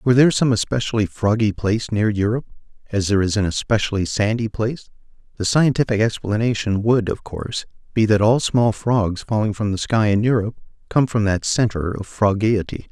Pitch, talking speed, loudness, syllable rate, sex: 110 Hz, 175 wpm, -20 LUFS, 5.7 syllables/s, male